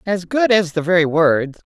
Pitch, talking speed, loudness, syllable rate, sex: 175 Hz, 210 wpm, -16 LUFS, 4.6 syllables/s, female